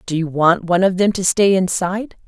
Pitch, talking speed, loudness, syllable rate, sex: 185 Hz, 240 wpm, -16 LUFS, 5.7 syllables/s, female